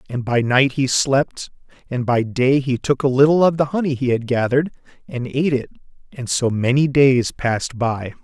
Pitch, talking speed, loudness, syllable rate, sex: 130 Hz, 195 wpm, -18 LUFS, 5.0 syllables/s, male